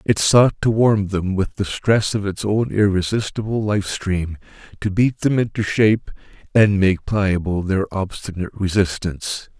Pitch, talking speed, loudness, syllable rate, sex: 100 Hz, 155 wpm, -19 LUFS, 4.5 syllables/s, male